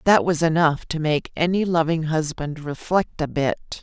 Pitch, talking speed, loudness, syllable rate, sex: 160 Hz, 175 wpm, -22 LUFS, 4.4 syllables/s, female